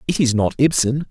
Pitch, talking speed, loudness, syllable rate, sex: 130 Hz, 215 wpm, -18 LUFS, 5.4 syllables/s, male